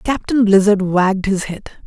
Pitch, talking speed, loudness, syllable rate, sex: 200 Hz, 160 wpm, -15 LUFS, 4.7 syllables/s, female